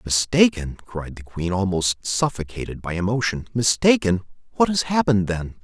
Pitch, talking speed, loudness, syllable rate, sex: 105 Hz, 140 wpm, -21 LUFS, 5.0 syllables/s, male